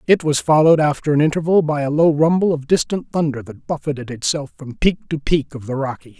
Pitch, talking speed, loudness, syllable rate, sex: 145 Hz, 225 wpm, -18 LUFS, 5.9 syllables/s, male